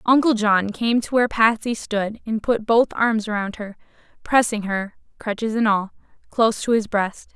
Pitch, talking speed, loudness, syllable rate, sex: 220 Hz, 165 wpm, -20 LUFS, 4.8 syllables/s, female